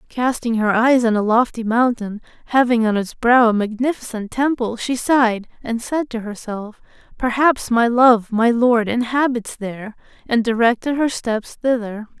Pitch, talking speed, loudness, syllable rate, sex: 235 Hz, 155 wpm, -18 LUFS, 4.5 syllables/s, female